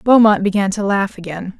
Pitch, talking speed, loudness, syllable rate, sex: 200 Hz, 190 wpm, -15 LUFS, 5.4 syllables/s, female